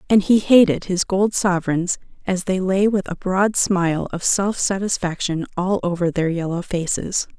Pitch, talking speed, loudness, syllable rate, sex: 185 Hz, 170 wpm, -20 LUFS, 4.6 syllables/s, female